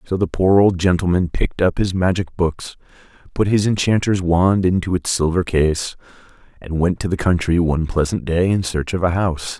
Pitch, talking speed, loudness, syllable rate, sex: 90 Hz, 195 wpm, -18 LUFS, 5.2 syllables/s, male